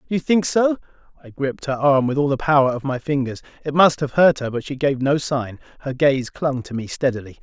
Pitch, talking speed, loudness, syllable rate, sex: 140 Hz, 250 wpm, -20 LUFS, 5.7 syllables/s, male